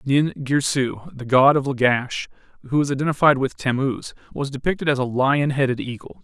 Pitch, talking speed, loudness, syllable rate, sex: 135 Hz, 175 wpm, -21 LUFS, 5.2 syllables/s, male